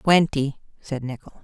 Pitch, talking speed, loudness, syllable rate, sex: 145 Hz, 125 wpm, -24 LUFS, 4.5 syllables/s, female